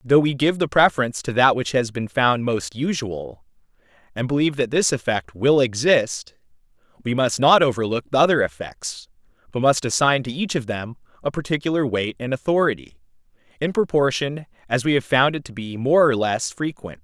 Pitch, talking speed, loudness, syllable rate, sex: 125 Hz, 185 wpm, -21 LUFS, 5.3 syllables/s, male